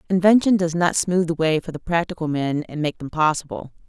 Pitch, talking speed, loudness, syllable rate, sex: 165 Hz, 215 wpm, -21 LUFS, 5.7 syllables/s, female